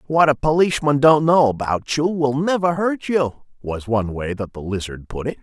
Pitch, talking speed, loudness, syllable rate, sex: 135 Hz, 210 wpm, -19 LUFS, 5.1 syllables/s, male